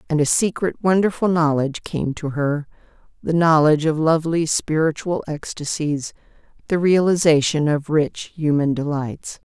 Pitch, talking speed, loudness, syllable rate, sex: 155 Hz, 120 wpm, -20 LUFS, 4.7 syllables/s, female